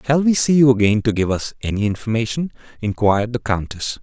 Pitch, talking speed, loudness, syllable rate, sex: 115 Hz, 195 wpm, -18 LUFS, 6.0 syllables/s, male